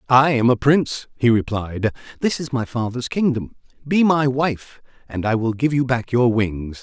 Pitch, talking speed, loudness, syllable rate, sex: 125 Hz, 195 wpm, -20 LUFS, 4.6 syllables/s, male